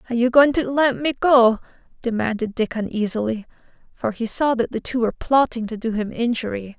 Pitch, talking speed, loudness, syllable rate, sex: 235 Hz, 195 wpm, -20 LUFS, 5.7 syllables/s, female